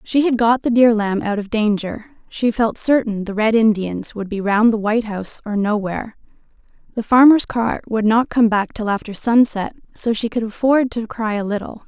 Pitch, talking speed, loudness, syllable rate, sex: 220 Hz, 205 wpm, -18 LUFS, 5.0 syllables/s, female